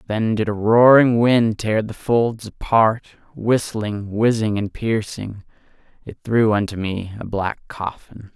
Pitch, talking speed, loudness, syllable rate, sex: 110 Hz, 145 wpm, -19 LUFS, 3.8 syllables/s, male